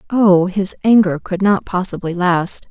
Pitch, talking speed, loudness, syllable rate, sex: 190 Hz, 155 wpm, -15 LUFS, 4.2 syllables/s, female